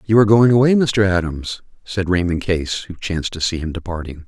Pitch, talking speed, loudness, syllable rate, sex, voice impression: 95 Hz, 210 wpm, -18 LUFS, 5.6 syllables/s, male, very masculine, slightly old, very thick, very tensed, powerful, slightly dark, soft, muffled, fluent, raspy, very cool, intellectual, slightly refreshing, sincere, calm, friendly, reassuring, very unique, elegant, very wild, sweet, lively, kind, slightly modest